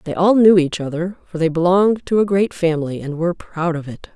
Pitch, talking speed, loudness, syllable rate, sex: 175 Hz, 245 wpm, -17 LUFS, 6.0 syllables/s, female